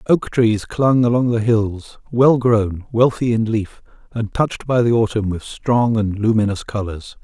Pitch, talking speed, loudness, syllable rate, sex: 115 Hz, 175 wpm, -18 LUFS, 4.3 syllables/s, male